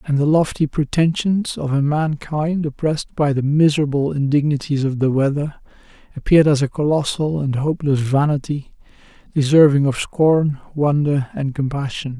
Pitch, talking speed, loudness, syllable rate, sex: 145 Hz, 140 wpm, -18 LUFS, 5.1 syllables/s, male